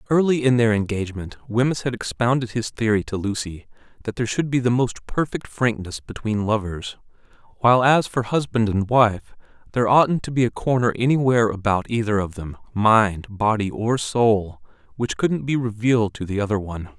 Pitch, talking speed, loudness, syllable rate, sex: 115 Hz, 175 wpm, -21 LUFS, 5.3 syllables/s, male